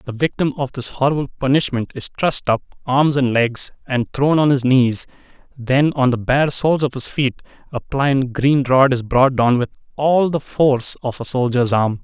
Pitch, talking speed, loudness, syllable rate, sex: 130 Hz, 200 wpm, -17 LUFS, 4.7 syllables/s, male